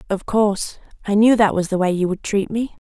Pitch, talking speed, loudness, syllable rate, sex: 205 Hz, 250 wpm, -19 LUFS, 5.6 syllables/s, female